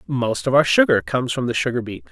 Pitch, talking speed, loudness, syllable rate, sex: 125 Hz, 255 wpm, -19 LUFS, 6.3 syllables/s, male